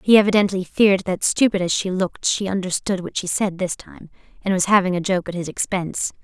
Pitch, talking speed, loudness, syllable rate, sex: 190 Hz, 220 wpm, -20 LUFS, 5.9 syllables/s, female